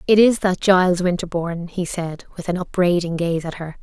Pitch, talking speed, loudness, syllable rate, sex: 175 Hz, 205 wpm, -20 LUFS, 5.4 syllables/s, female